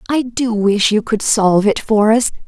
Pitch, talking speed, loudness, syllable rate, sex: 220 Hz, 220 wpm, -14 LUFS, 4.7 syllables/s, female